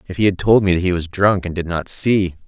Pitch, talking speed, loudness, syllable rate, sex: 90 Hz, 290 wpm, -17 LUFS, 5.3 syllables/s, male